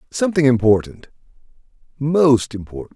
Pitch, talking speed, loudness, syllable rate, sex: 135 Hz, 60 wpm, -17 LUFS, 5.2 syllables/s, male